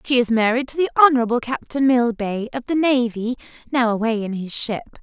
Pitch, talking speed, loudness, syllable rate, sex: 240 Hz, 190 wpm, -20 LUFS, 5.7 syllables/s, female